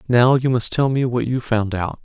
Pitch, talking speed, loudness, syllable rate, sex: 120 Hz, 265 wpm, -19 LUFS, 4.9 syllables/s, male